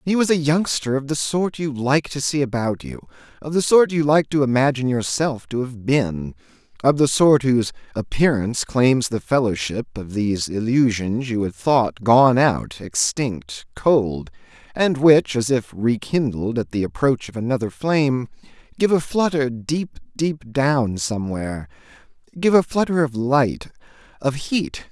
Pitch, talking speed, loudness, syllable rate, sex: 125 Hz, 160 wpm, -20 LUFS, 4.4 syllables/s, male